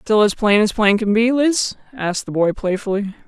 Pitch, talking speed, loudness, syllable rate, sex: 215 Hz, 220 wpm, -18 LUFS, 5.4 syllables/s, female